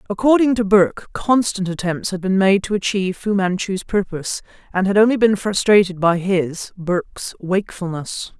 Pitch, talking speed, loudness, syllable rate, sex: 195 Hz, 155 wpm, -18 LUFS, 5.5 syllables/s, female